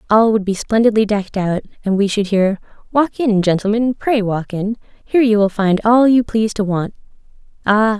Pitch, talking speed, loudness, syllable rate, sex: 210 Hz, 195 wpm, -16 LUFS, 5.3 syllables/s, female